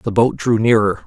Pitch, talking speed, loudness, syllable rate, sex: 110 Hz, 225 wpm, -16 LUFS, 5.0 syllables/s, male